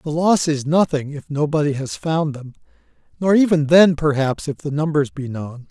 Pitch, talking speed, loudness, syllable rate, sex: 150 Hz, 190 wpm, -19 LUFS, 4.8 syllables/s, male